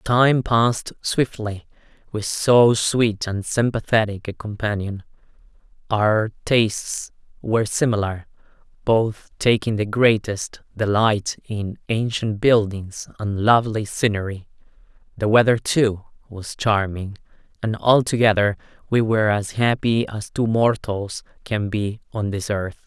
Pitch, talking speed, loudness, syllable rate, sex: 110 Hz, 115 wpm, -21 LUFS, 4.0 syllables/s, male